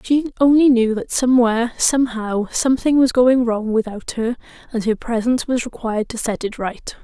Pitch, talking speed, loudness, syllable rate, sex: 235 Hz, 180 wpm, -18 LUFS, 5.4 syllables/s, female